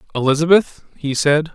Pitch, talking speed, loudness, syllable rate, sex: 155 Hz, 115 wpm, -16 LUFS, 5.4 syllables/s, male